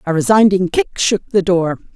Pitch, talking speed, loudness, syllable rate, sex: 190 Hz, 185 wpm, -15 LUFS, 4.7 syllables/s, female